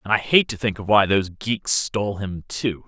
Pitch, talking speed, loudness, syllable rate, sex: 105 Hz, 250 wpm, -21 LUFS, 5.1 syllables/s, male